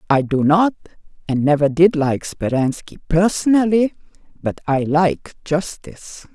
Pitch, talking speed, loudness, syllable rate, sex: 165 Hz, 125 wpm, -18 LUFS, 4.3 syllables/s, female